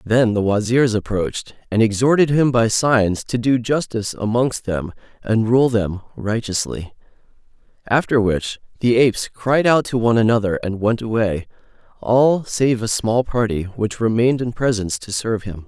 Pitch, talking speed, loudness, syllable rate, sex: 115 Hz, 160 wpm, -18 LUFS, 4.8 syllables/s, male